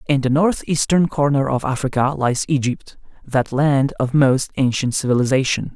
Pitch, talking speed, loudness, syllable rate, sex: 135 Hz, 145 wpm, -18 LUFS, 4.8 syllables/s, male